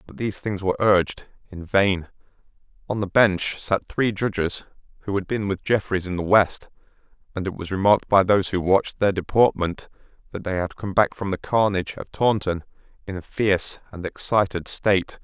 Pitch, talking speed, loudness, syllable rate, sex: 95 Hz, 185 wpm, -22 LUFS, 5.4 syllables/s, male